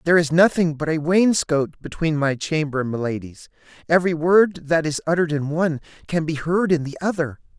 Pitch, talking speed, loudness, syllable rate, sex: 160 Hz, 190 wpm, -20 LUFS, 5.6 syllables/s, male